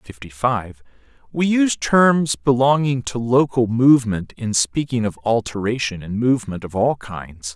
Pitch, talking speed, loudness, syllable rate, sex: 120 Hz, 145 wpm, -19 LUFS, 4.4 syllables/s, male